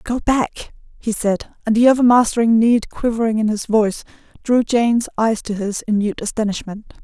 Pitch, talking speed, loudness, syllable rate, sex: 225 Hz, 170 wpm, -18 LUFS, 5.1 syllables/s, female